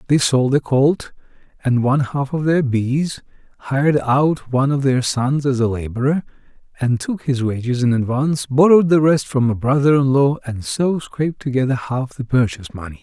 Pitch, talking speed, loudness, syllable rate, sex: 135 Hz, 190 wpm, -18 LUFS, 5.2 syllables/s, male